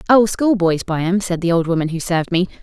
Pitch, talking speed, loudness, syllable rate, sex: 180 Hz, 250 wpm, -18 LUFS, 6.0 syllables/s, female